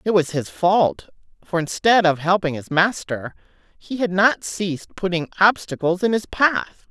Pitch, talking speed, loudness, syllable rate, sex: 185 Hz, 165 wpm, -20 LUFS, 4.5 syllables/s, female